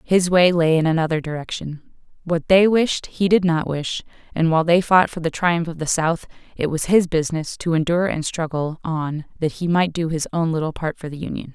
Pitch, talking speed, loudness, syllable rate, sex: 165 Hz, 225 wpm, -20 LUFS, 5.4 syllables/s, female